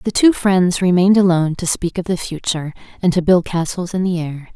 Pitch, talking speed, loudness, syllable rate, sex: 180 Hz, 225 wpm, -17 LUFS, 5.7 syllables/s, female